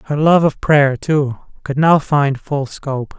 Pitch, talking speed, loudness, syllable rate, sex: 140 Hz, 190 wpm, -16 LUFS, 4.0 syllables/s, male